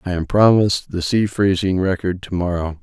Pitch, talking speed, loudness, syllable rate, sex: 90 Hz, 190 wpm, -18 LUFS, 5.2 syllables/s, male